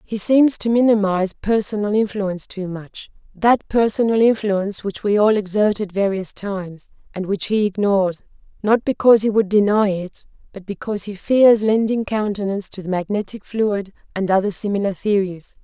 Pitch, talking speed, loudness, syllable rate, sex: 205 Hz, 155 wpm, -19 LUFS, 5.2 syllables/s, female